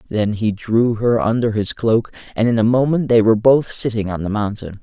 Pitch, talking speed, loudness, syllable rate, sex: 110 Hz, 225 wpm, -17 LUFS, 5.2 syllables/s, male